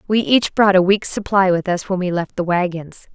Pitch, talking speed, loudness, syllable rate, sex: 190 Hz, 250 wpm, -17 LUFS, 5.1 syllables/s, female